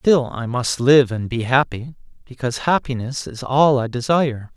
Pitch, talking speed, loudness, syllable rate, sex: 130 Hz, 170 wpm, -19 LUFS, 4.8 syllables/s, male